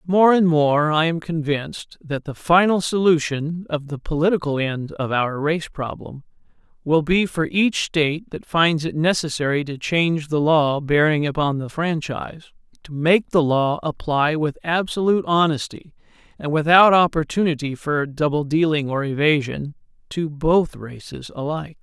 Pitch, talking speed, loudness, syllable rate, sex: 155 Hz, 150 wpm, -20 LUFS, 4.6 syllables/s, male